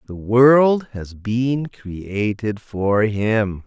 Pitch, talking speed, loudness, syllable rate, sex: 110 Hz, 115 wpm, -18 LUFS, 2.3 syllables/s, male